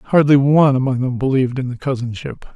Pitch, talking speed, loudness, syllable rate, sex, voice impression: 135 Hz, 190 wpm, -16 LUFS, 6.1 syllables/s, male, masculine, middle-aged, slightly relaxed, slightly soft, fluent, slightly calm, friendly, unique